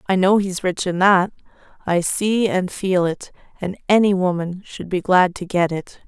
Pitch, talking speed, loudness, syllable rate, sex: 185 Hz, 200 wpm, -19 LUFS, 4.5 syllables/s, female